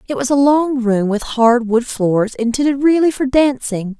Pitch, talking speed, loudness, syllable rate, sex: 250 Hz, 195 wpm, -15 LUFS, 4.6 syllables/s, female